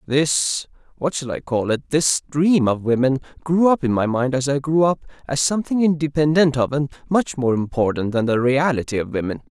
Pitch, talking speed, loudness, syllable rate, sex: 140 Hz, 180 wpm, -20 LUFS, 5.3 syllables/s, male